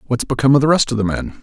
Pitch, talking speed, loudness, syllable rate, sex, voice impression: 130 Hz, 335 wpm, -16 LUFS, 8.3 syllables/s, male, very masculine, adult-like, slightly thick, cool, slightly intellectual, slightly wild, slightly sweet